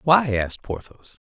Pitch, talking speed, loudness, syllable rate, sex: 120 Hz, 140 wpm, -23 LUFS, 4.6 syllables/s, male